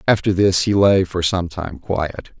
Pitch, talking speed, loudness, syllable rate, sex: 90 Hz, 200 wpm, -18 LUFS, 4.0 syllables/s, male